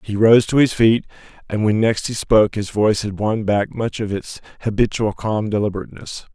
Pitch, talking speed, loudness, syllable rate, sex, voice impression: 110 Hz, 200 wpm, -18 LUFS, 5.4 syllables/s, male, very masculine, slightly old, very thick, slightly tensed, weak, dark, soft, slightly muffled, fluent, slightly raspy, cool, slightly intellectual, slightly refreshing, sincere, very calm, very mature, slightly friendly, slightly reassuring, unique, slightly elegant, wild, slightly sweet, slightly lively, kind, modest